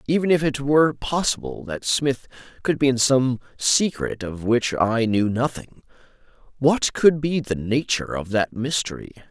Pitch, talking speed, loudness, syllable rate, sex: 130 Hz, 160 wpm, -21 LUFS, 4.6 syllables/s, male